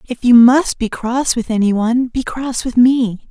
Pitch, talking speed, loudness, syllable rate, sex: 240 Hz, 200 wpm, -14 LUFS, 4.2 syllables/s, female